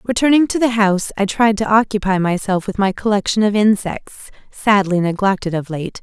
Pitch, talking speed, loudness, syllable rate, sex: 205 Hz, 180 wpm, -16 LUFS, 5.5 syllables/s, female